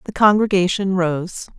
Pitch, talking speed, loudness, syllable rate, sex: 190 Hz, 115 wpm, -17 LUFS, 4.4 syllables/s, female